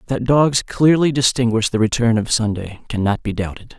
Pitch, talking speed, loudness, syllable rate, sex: 115 Hz, 175 wpm, -18 LUFS, 5.1 syllables/s, male